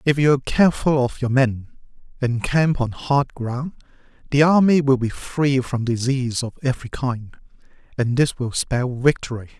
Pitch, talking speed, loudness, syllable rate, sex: 130 Hz, 170 wpm, -20 LUFS, 4.8 syllables/s, male